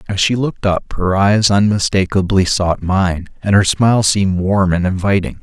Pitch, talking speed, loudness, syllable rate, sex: 95 Hz, 175 wpm, -15 LUFS, 4.9 syllables/s, male